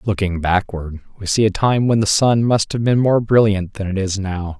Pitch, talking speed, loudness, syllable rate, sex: 105 Hz, 235 wpm, -17 LUFS, 4.9 syllables/s, male